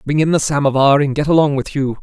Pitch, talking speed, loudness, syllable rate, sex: 145 Hz, 265 wpm, -15 LUFS, 6.4 syllables/s, male